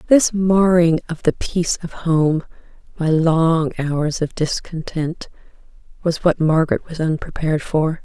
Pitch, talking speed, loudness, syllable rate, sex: 165 Hz, 135 wpm, -19 LUFS, 4.2 syllables/s, female